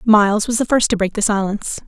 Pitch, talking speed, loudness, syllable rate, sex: 210 Hz, 255 wpm, -17 LUFS, 6.3 syllables/s, female